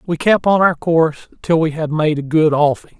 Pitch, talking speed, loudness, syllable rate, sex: 160 Hz, 240 wpm, -15 LUFS, 5.2 syllables/s, male